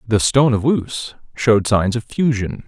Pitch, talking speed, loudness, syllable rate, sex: 115 Hz, 180 wpm, -17 LUFS, 4.7 syllables/s, male